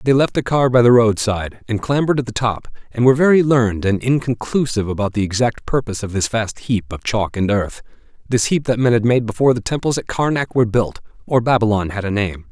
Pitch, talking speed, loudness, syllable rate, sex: 115 Hz, 230 wpm, -17 LUFS, 6.2 syllables/s, male